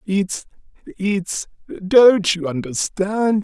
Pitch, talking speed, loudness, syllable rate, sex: 195 Hz, 50 wpm, -18 LUFS, 2.9 syllables/s, male